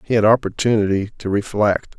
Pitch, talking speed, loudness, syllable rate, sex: 105 Hz, 150 wpm, -18 LUFS, 5.5 syllables/s, male